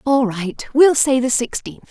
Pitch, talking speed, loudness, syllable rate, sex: 255 Hz, 190 wpm, -17 LUFS, 4.1 syllables/s, female